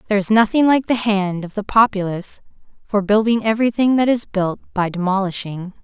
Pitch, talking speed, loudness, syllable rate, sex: 205 Hz, 175 wpm, -18 LUFS, 5.6 syllables/s, female